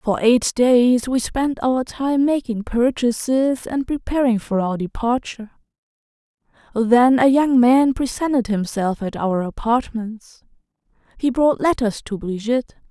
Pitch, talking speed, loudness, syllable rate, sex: 240 Hz, 130 wpm, -19 LUFS, 4.1 syllables/s, female